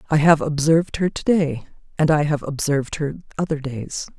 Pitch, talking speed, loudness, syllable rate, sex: 150 Hz, 185 wpm, -20 LUFS, 5.5 syllables/s, female